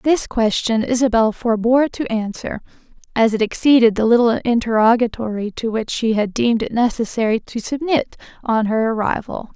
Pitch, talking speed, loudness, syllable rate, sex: 230 Hz, 150 wpm, -18 LUFS, 5.2 syllables/s, female